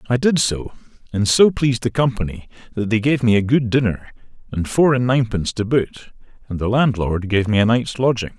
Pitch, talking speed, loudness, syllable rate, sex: 115 Hz, 210 wpm, -18 LUFS, 5.7 syllables/s, male